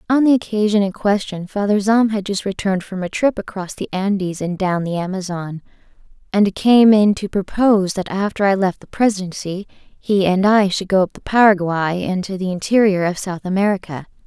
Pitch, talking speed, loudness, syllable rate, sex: 195 Hz, 190 wpm, -18 LUFS, 5.4 syllables/s, female